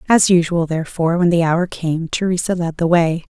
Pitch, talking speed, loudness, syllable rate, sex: 170 Hz, 195 wpm, -17 LUFS, 5.5 syllables/s, female